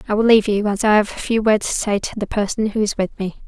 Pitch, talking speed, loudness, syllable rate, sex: 210 Hz, 330 wpm, -18 LUFS, 6.8 syllables/s, female